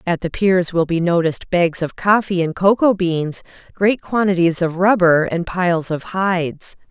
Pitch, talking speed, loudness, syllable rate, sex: 180 Hz, 175 wpm, -17 LUFS, 4.6 syllables/s, female